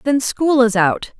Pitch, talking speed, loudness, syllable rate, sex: 235 Hz, 200 wpm, -16 LUFS, 3.9 syllables/s, female